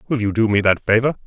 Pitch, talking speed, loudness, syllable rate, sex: 110 Hz, 285 wpm, -17 LUFS, 6.9 syllables/s, male